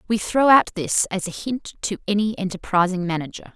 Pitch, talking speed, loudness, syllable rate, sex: 195 Hz, 185 wpm, -21 LUFS, 5.3 syllables/s, female